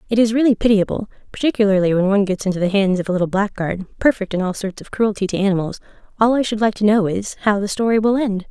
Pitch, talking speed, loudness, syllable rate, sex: 205 Hz, 245 wpm, -18 LUFS, 6.8 syllables/s, female